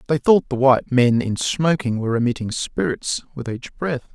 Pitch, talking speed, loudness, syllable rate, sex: 130 Hz, 190 wpm, -20 LUFS, 5.0 syllables/s, male